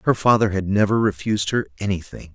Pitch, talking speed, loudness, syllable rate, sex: 100 Hz, 180 wpm, -20 LUFS, 6.1 syllables/s, male